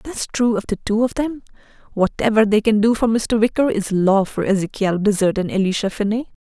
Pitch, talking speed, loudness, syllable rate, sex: 215 Hz, 195 wpm, -18 LUFS, 5.6 syllables/s, female